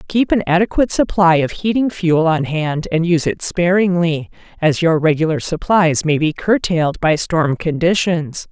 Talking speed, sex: 160 wpm, female